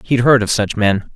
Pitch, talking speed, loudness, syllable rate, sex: 110 Hz, 260 wpm, -15 LUFS, 4.8 syllables/s, male